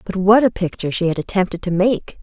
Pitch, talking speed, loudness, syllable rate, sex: 190 Hz, 245 wpm, -18 LUFS, 6.1 syllables/s, female